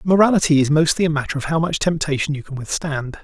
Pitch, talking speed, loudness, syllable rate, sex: 155 Hz, 220 wpm, -19 LUFS, 6.5 syllables/s, male